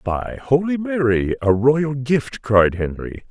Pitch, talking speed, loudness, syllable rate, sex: 130 Hz, 145 wpm, -19 LUFS, 3.5 syllables/s, male